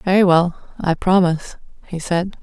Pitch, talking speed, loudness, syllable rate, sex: 175 Hz, 125 wpm, -18 LUFS, 4.6 syllables/s, female